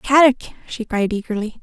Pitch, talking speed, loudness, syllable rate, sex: 230 Hz, 150 wpm, -18 LUFS, 5.0 syllables/s, female